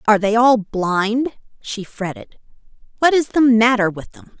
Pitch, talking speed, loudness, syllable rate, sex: 225 Hz, 165 wpm, -17 LUFS, 4.6 syllables/s, female